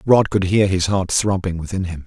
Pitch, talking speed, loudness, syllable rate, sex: 95 Hz, 235 wpm, -18 LUFS, 5.2 syllables/s, male